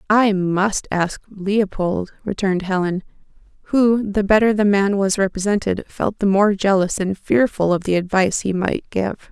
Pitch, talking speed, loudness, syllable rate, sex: 195 Hz, 160 wpm, -19 LUFS, 4.5 syllables/s, female